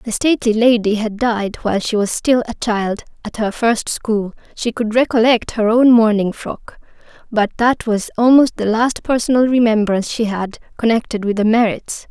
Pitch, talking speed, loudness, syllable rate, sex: 225 Hz, 180 wpm, -16 LUFS, 4.9 syllables/s, female